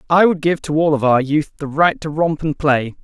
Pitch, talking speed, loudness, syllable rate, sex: 155 Hz, 275 wpm, -17 LUFS, 5.1 syllables/s, male